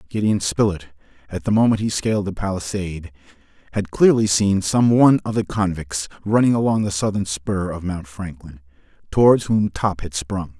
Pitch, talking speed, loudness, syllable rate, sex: 95 Hz, 170 wpm, -20 LUFS, 5.2 syllables/s, male